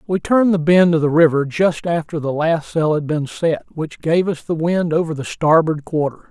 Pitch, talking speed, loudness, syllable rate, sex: 160 Hz, 230 wpm, -17 LUFS, 5.1 syllables/s, male